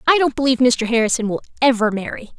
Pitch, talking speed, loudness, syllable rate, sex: 245 Hz, 200 wpm, -18 LUFS, 7.1 syllables/s, female